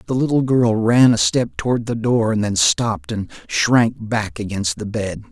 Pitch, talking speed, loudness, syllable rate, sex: 110 Hz, 205 wpm, -18 LUFS, 4.5 syllables/s, male